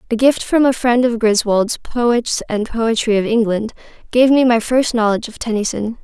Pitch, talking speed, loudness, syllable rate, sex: 230 Hz, 190 wpm, -16 LUFS, 4.9 syllables/s, female